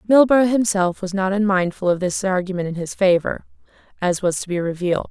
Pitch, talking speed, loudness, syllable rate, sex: 190 Hz, 190 wpm, -19 LUFS, 5.7 syllables/s, female